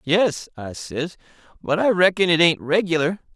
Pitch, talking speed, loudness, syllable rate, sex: 170 Hz, 160 wpm, -20 LUFS, 4.5 syllables/s, male